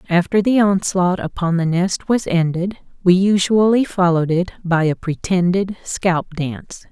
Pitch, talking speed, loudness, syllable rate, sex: 180 Hz, 150 wpm, -18 LUFS, 4.4 syllables/s, female